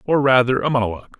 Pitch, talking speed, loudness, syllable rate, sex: 125 Hz, 200 wpm, -18 LUFS, 7.3 syllables/s, male